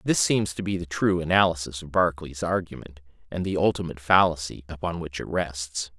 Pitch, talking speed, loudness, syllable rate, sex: 85 Hz, 180 wpm, -25 LUFS, 5.6 syllables/s, male